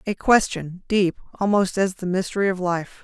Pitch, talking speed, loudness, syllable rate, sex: 190 Hz, 180 wpm, -22 LUFS, 5.0 syllables/s, female